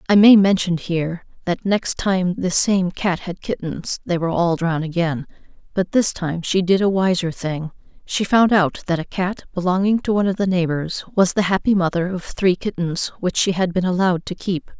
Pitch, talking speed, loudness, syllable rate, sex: 180 Hz, 205 wpm, -19 LUFS, 5.1 syllables/s, female